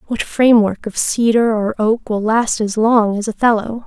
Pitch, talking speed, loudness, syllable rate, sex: 220 Hz, 185 wpm, -15 LUFS, 4.7 syllables/s, female